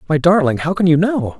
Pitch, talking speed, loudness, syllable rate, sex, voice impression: 165 Hz, 260 wpm, -15 LUFS, 5.8 syllables/s, male, masculine, adult-like, slightly fluent, slightly cool, slightly refreshing, sincere